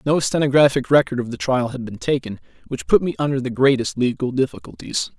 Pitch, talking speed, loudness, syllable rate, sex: 130 Hz, 195 wpm, -20 LUFS, 6.0 syllables/s, male